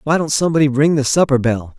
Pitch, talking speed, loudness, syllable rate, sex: 145 Hz, 235 wpm, -15 LUFS, 6.6 syllables/s, male